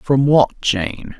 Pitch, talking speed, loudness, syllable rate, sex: 125 Hz, 150 wpm, -16 LUFS, 2.6 syllables/s, male